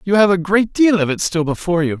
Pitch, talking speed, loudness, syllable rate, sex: 185 Hz, 300 wpm, -16 LUFS, 6.4 syllables/s, male